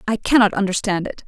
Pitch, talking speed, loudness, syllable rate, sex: 205 Hz, 190 wpm, -18 LUFS, 6.3 syllables/s, female